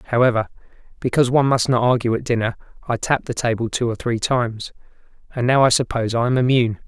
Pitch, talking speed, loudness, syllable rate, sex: 120 Hz, 200 wpm, -19 LUFS, 7.0 syllables/s, male